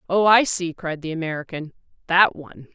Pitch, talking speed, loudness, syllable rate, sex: 170 Hz, 175 wpm, -20 LUFS, 5.5 syllables/s, female